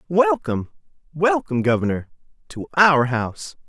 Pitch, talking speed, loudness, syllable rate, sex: 130 Hz, 100 wpm, -20 LUFS, 5.1 syllables/s, male